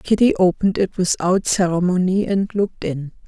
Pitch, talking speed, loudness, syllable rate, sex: 185 Hz, 145 wpm, -19 LUFS, 5.3 syllables/s, female